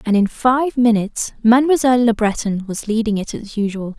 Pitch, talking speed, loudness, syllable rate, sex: 225 Hz, 180 wpm, -17 LUFS, 5.7 syllables/s, female